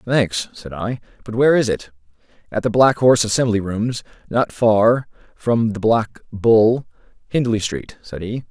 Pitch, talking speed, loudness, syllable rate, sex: 110 Hz, 160 wpm, -18 LUFS, 4.4 syllables/s, male